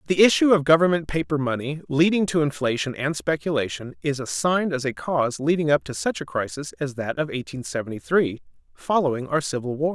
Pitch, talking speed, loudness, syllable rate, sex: 145 Hz, 195 wpm, -23 LUFS, 5.8 syllables/s, male